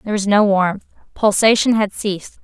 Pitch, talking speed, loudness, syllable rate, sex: 205 Hz, 170 wpm, -16 LUFS, 5.5 syllables/s, female